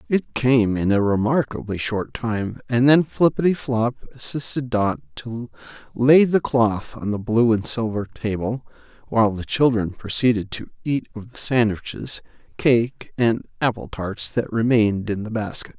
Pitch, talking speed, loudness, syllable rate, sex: 115 Hz, 150 wpm, -21 LUFS, 4.4 syllables/s, male